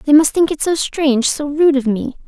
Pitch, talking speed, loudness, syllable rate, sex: 290 Hz, 265 wpm, -15 LUFS, 5.2 syllables/s, female